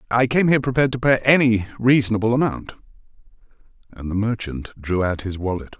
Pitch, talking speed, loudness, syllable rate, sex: 115 Hz, 165 wpm, -20 LUFS, 6.2 syllables/s, male